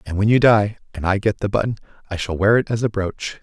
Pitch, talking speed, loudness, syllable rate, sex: 105 Hz, 280 wpm, -19 LUFS, 6.0 syllables/s, male